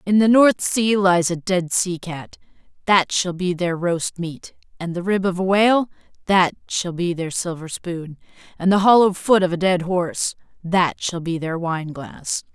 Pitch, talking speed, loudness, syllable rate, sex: 180 Hz, 175 wpm, -20 LUFS, 4.4 syllables/s, female